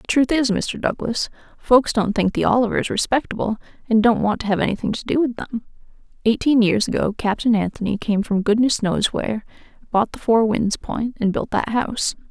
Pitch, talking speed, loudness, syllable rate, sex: 225 Hz, 195 wpm, -20 LUFS, 5.3 syllables/s, female